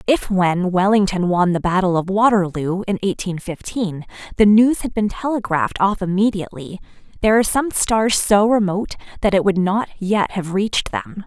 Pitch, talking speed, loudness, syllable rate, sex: 195 Hz, 170 wpm, -18 LUFS, 5.2 syllables/s, female